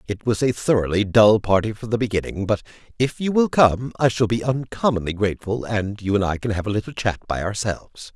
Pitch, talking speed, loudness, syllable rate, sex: 110 Hz, 220 wpm, -21 LUFS, 5.7 syllables/s, male